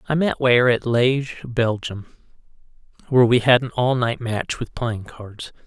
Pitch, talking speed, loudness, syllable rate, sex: 120 Hz, 170 wpm, -20 LUFS, 4.4 syllables/s, male